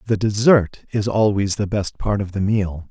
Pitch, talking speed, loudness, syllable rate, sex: 100 Hz, 205 wpm, -19 LUFS, 4.5 syllables/s, male